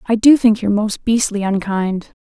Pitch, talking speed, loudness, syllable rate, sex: 215 Hz, 190 wpm, -16 LUFS, 5.0 syllables/s, female